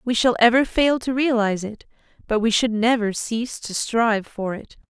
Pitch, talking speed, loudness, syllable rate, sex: 230 Hz, 195 wpm, -21 LUFS, 5.1 syllables/s, female